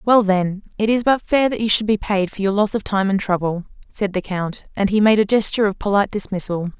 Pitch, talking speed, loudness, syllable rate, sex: 205 Hz, 255 wpm, -19 LUFS, 5.8 syllables/s, female